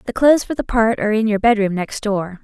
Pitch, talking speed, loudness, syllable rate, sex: 215 Hz, 270 wpm, -17 LUFS, 6.2 syllables/s, female